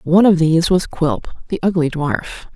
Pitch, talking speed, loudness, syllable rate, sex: 170 Hz, 190 wpm, -17 LUFS, 5.6 syllables/s, female